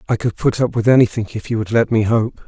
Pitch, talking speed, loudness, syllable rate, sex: 115 Hz, 290 wpm, -17 LUFS, 6.2 syllables/s, male